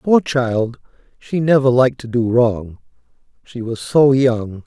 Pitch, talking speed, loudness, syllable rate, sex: 125 Hz, 140 wpm, -16 LUFS, 4.0 syllables/s, male